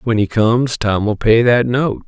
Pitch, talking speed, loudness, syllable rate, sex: 115 Hz, 205 wpm, -15 LUFS, 4.1 syllables/s, male